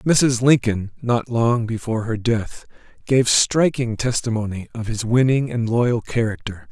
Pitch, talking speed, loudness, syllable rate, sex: 115 Hz, 145 wpm, -20 LUFS, 4.2 syllables/s, male